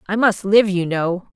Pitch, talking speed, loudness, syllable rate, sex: 195 Hz, 220 wpm, -18 LUFS, 4.3 syllables/s, female